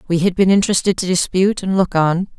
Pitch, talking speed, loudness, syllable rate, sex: 185 Hz, 225 wpm, -16 LUFS, 6.6 syllables/s, female